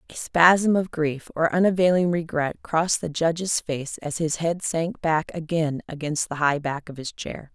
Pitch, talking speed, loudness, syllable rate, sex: 165 Hz, 190 wpm, -23 LUFS, 4.4 syllables/s, female